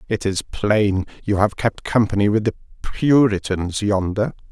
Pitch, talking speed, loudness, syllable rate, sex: 105 Hz, 145 wpm, -20 LUFS, 4.3 syllables/s, male